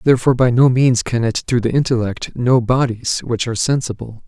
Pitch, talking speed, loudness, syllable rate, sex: 120 Hz, 195 wpm, -16 LUFS, 5.6 syllables/s, male